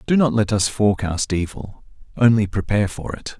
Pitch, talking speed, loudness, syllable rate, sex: 105 Hz, 175 wpm, -20 LUFS, 5.5 syllables/s, male